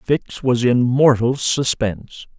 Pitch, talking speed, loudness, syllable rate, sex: 125 Hz, 125 wpm, -17 LUFS, 3.6 syllables/s, male